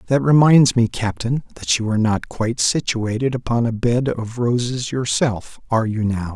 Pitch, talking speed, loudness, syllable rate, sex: 120 Hz, 180 wpm, -19 LUFS, 4.9 syllables/s, male